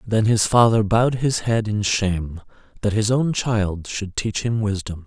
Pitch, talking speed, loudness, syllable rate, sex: 105 Hz, 190 wpm, -20 LUFS, 4.4 syllables/s, male